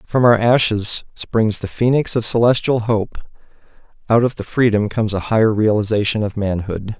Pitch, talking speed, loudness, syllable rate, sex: 110 Hz, 165 wpm, -17 LUFS, 5.1 syllables/s, male